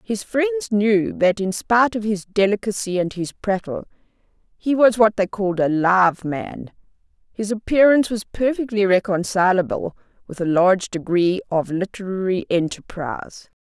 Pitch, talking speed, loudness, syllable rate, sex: 200 Hz, 140 wpm, -20 LUFS, 4.8 syllables/s, female